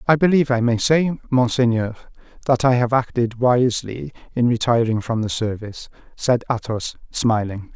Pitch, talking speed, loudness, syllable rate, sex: 120 Hz, 145 wpm, -20 LUFS, 5.1 syllables/s, male